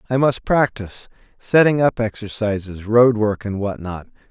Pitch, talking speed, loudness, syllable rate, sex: 110 Hz, 140 wpm, -18 LUFS, 4.7 syllables/s, male